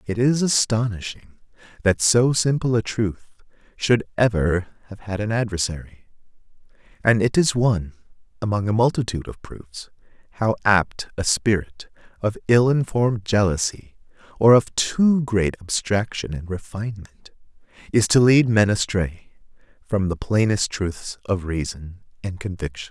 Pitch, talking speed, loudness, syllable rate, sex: 105 Hz, 135 wpm, -21 LUFS, 4.5 syllables/s, male